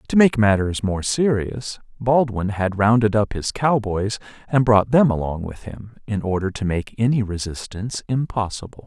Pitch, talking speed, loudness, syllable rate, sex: 110 Hz, 160 wpm, -20 LUFS, 4.7 syllables/s, male